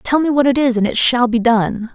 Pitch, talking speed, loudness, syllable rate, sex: 245 Hz, 310 wpm, -15 LUFS, 5.2 syllables/s, female